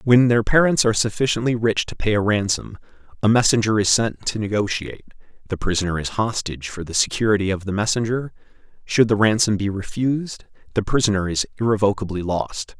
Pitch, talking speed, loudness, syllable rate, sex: 105 Hz, 170 wpm, -20 LUFS, 6.0 syllables/s, male